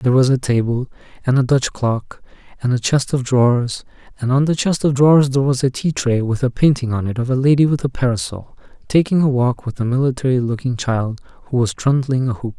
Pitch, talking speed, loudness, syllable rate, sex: 130 Hz, 230 wpm, -17 LUFS, 5.8 syllables/s, male